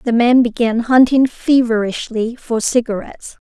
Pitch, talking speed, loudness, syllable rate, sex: 235 Hz, 120 wpm, -15 LUFS, 4.6 syllables/s, female